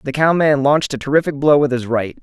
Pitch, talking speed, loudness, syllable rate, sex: 140 Hz, 245 wpm, -16 LUFS, 6.2 syllables/s, male